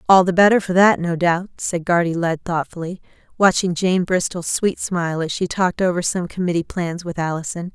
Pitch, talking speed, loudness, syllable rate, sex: 175 Hz, 195 wpm, -19 LUFS, 5.3 syllables/s, female